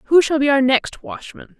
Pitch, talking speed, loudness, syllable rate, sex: 275 Hz, 225 wpm, -16 LUFS, 5.0 syllables/s, female